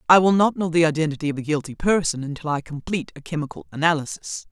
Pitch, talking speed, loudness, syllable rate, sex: 155 Hz, 215 wpm, -22 LUFS, 6.8 syllables/s, female